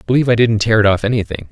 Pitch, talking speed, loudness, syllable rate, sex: 110 Hz, 315 wpm, -14 LUFS, 8.5 syllables/s, male